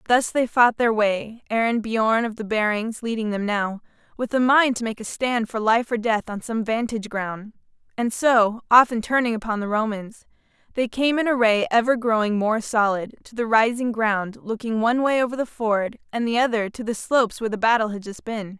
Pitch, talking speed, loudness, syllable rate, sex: 225 Hz, 205 wpm, -22 LUFS, 5.2 syllables/s, female